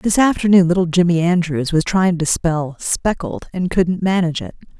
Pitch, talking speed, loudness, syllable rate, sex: 175 Hz, 175 wpm, -17 LUFS, 4.9 syllables/s, female